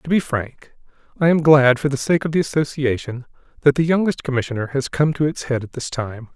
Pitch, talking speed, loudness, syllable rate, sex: 140 Hz, 225 wpm, -19 LUFS, 5.7 syllables/s, male